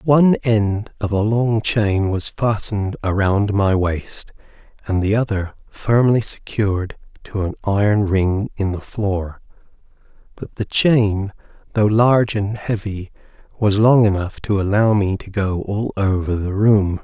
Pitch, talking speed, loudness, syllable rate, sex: 105 Hz, 150 wpm, -18 LUFS, 4.0 syllables/s, male